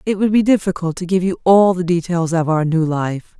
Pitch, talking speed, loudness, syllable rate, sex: 175 Hz, 250 wpm, -16 LUFS, 5.3 syllables/s, female